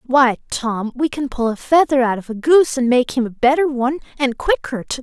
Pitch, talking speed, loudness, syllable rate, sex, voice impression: 260 Hz, 240 wpm, -17 LUFS, 5.5 syllables/s, female, feminine, adult-like, powerful, slightly cute, slightly unique, slightly intense